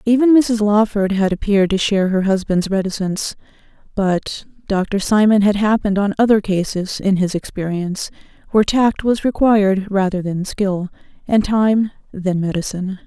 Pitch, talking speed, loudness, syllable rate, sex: 200 Hz, 145 wpm, -17 LUFS, 5.1 syllables/s, female